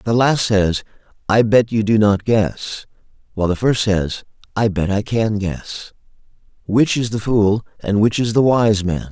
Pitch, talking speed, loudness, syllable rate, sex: 110 Hz, 185 wpm, -17 LUFS, 4.2 syllables/s, male